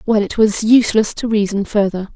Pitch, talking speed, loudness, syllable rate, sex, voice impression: 210 Hz, 195 wpm, -15 LUFS, 5.4 syllables/s, female, feminine, slightly adult-like, cute, slightly refreshing, slightly calm, slightly kind